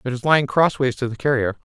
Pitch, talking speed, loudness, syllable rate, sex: 130 Hz, 245 wpm, -19 LUFS, 6.7 syllables/s, male